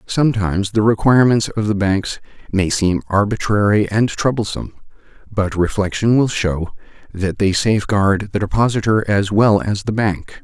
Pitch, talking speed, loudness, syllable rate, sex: 105 Hz, 145 wpm, -17 LUFS, 5.0 syllables/s, male